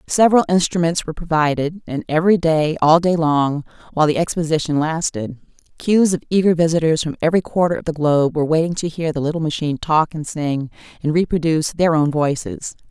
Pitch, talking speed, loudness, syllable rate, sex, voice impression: 160 Hz, 180 wpm, -18 LUFS, 6.1 syllables/s, female, feminine, very adult-like, slightly fluent, intellectual, slightly calm, elegant, slightly kind